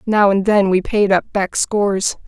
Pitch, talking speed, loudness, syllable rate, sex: 200 Hz, 210 wpm, -16 LUFS, 4.5 syllables/s, female